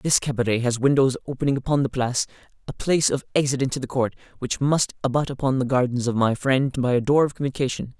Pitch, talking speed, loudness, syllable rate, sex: 130 Hz, 220 wpm, -22 LUFS, 6.6 syllables/s, male